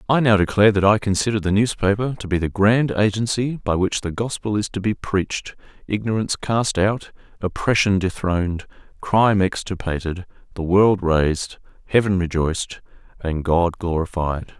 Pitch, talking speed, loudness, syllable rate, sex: 100 Hz, 150 wpm, -20 LUFS, 5.1 syllables/s, male